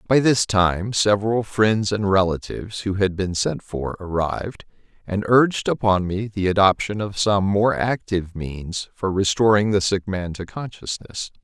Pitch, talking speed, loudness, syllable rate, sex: 100 Hz, 165 wpm, -21 LUFS, 4.5 syllables/s, male